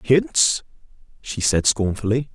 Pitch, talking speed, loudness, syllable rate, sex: 125 Hz, 100 wpm, -20 LUFS, 3.6 syllables/s, male